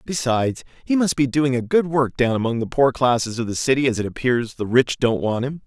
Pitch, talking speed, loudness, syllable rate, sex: 130 Hz, 255 wpm, -20 LUFS, 5.7 syllables/s, male